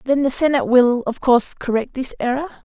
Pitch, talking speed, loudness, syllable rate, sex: 260 Hz, 195 wpm, -18 LUFS, 5.7 syllables/s, female